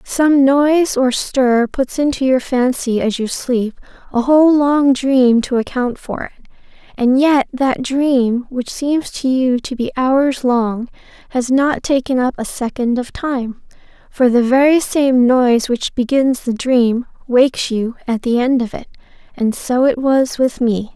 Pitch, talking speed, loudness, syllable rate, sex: 255 Hz, 175 wpm, -15 LUFS, 4.0 syllables/s, female